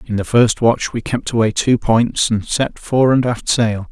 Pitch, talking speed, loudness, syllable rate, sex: 115 Hz, 230 wpm, -16 LUFS, 4.2 syllables/s, male